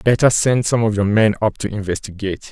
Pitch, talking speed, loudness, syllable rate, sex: 110 Hz, 215 wpm, -17 LUFS, 5.8 syllables/s, male